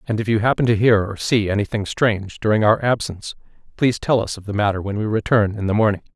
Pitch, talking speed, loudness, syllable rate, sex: 105 Hz, 245 wpm, -19 LUFS, 6.5 syllables/s, male